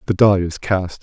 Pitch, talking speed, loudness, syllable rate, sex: 95 Hz, 235 wpm, -17 LUFS, 4.7 syllables/s, male